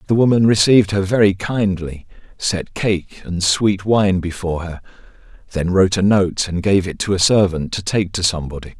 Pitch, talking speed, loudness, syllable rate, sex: 95 Hz, 185 wpm, -17 LUFS, 5.2 syllables/s, male